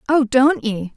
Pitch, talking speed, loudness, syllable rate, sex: 255 Hz, 190 wpm, -17 LUFS, 3.9 syllables/s, female